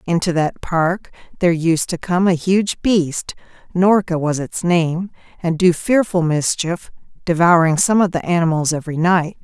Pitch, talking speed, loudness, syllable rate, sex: 170 Hz, 145 wpm, -17 LUFS, 4.6 syllables/s, female